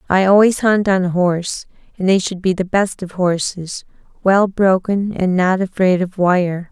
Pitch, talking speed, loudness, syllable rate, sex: 185 Hz, 190 wpm, -16 LUFS, 4.5 syllables/s, female